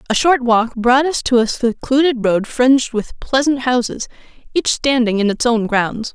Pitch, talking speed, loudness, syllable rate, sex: 245 Hz, 185 wpm, -16 LUFS, 4.6 syllables/s, female